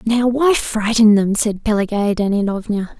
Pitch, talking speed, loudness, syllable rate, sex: 215 Hz, 140 wpm, -16 LUFS, 4.5 syllables/s, female